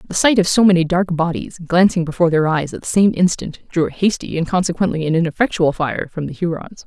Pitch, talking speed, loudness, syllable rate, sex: 170 Hz, 225 wpm, -17 LUFS, 6.1 syllables/s, female